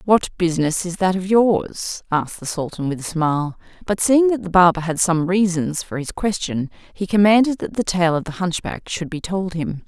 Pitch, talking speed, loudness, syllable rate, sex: 180 Hz, 215 wpm, -20 LUFS, 5.0 syllables/s, female